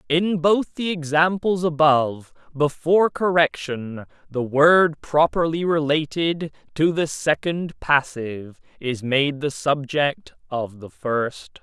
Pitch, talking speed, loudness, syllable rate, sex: 150 Hz, 115 wpm, -21 LUFS, 3.7 syllables/s, male